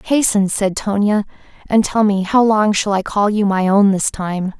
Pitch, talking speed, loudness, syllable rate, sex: 205 Hz, 195 wpm, -16 LUFS, 4.5 syllables/s, female